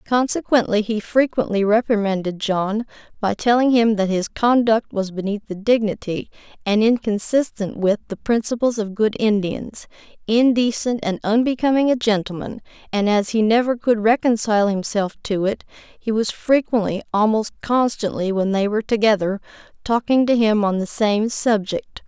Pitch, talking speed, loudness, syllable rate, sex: 215 Hz, 145 wpm, -19 LUFS, 4.8 syllables/s, female